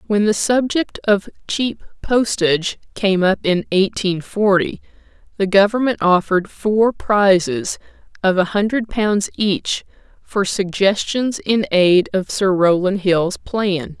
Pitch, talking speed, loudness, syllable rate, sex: 200 Hz, 130 wpm, -17 LUFS, 3.8 syllables/s, female